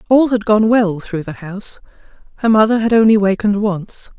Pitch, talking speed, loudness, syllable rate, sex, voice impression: 210 Hz, 185 wpm, -15 LUFS, 5.4 syllables/s, female, feminine, adult-like, slightly relaxed, slightly dark, soft, clear, fluent, intellectual, calm, friendly, elegant, lively, modest